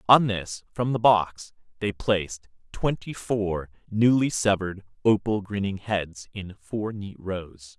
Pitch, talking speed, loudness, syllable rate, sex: 100 Hz, 140 wpm, -26 LUFS, 3.8 syllables/s, male